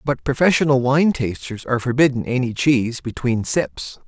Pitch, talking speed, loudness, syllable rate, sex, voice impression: 125 Hz, 145 wpm, -19 LUFS, 5.1 syllables/s, male, masculine, adult-like, slightly bright, clear, fluent, slightly cool, sincere, calm, friendly, reassuring, kind, light